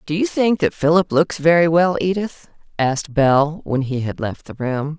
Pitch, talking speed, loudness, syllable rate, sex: 155 Hz, 205 wpm, -18 LUFS, 4.9 syllables/s, female